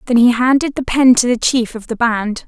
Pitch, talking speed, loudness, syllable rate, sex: 240 Hz, 265 wpm, -14 LUFS, 5.2 syllables/s, female